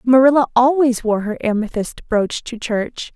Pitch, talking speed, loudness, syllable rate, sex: 240 Hz, 150 wpm, -17 LUFS, 4.4 syllables/s, female